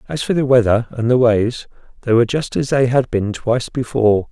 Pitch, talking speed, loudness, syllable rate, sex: 120 Hz, 220 wpm, -17 LUFS, 5.6 syllables/s, male